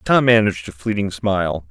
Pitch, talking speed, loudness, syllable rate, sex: 100 Hz, 175 wpm, -18 LUFS, 5.6 syllables/s, male